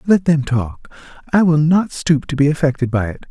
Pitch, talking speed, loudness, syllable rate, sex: 145 Hz, 200 wpm, -16 LUFS, 5.2 syllables/s, male